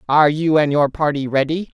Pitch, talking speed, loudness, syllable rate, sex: 150 Hz, 200 wpm, -17 LUFS, 5.7 syllables/s, female